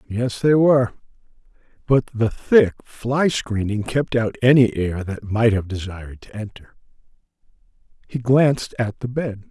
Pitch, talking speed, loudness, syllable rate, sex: 115 Hz, 145 wpm, -20 LUFS, 4.3 syllables/s, male